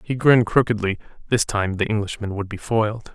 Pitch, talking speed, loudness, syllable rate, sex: 105 Hz, 190 wpm, -21 LUFS, 5.9 syllables/s, male